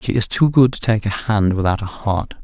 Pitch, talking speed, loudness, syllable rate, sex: 105 Hz, 270 wpm, -18 LUFS, 5.3 syllables/s, male